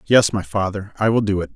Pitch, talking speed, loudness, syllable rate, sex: 100 Hz, 270 wpm, -20 LUFS, 5.7 syllables/s, male